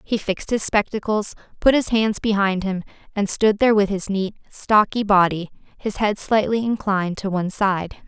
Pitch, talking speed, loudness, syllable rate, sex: 205 Hz, 180 wpm, -20 LUFS, 5.0 syllables/s, female